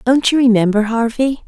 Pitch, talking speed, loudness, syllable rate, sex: 240 Hz, 165 wpm, -14 LUFS, 5.3 syllables/s, female